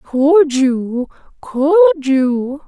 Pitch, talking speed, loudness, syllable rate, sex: 285 Hz, 90 wpm, -14 LUFS, 2.0 syllables/s, female